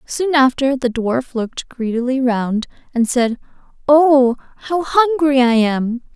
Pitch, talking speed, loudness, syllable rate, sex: 260 Hz, 135 wpm, -16 LUFS, 3.9 syllables/s, female